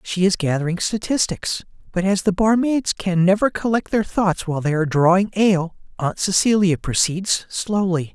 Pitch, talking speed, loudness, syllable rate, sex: 190 Hz, 160 wpm, -19 LUFS, 4.8 syllables/s, male